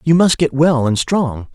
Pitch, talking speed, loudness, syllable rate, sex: 145 Hz, 235 wpm, -15 LUFS, 4.3 syllables/s, male